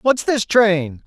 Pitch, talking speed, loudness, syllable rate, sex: 205 Hz, 170 wpm, -17 LUFS, 3.2 syllables/s, male